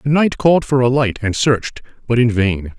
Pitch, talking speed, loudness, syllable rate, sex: 125 Hz, 235 wpm, -16 LUFS, 5.4 syllables/s, male